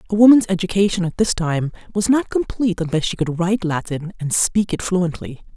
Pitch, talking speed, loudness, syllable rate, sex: 185 Hz, 195 wpm, -19 LUFS, 5.7 syllables/s, female